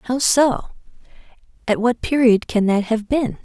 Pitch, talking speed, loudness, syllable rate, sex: 240 Hz, 140 wpm, -18 LUFS, 4.2 syllables/s, female